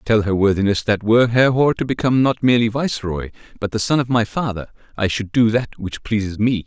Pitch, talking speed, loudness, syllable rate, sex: 110 Hz, 215 wpm, -18 LUFS, 6.1 syllables/s, male